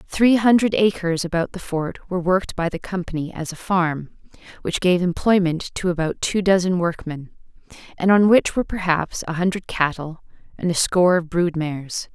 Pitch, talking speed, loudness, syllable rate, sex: 175 Hz, 180 wpm, -20 LUFS, 5.2 syllables/s, female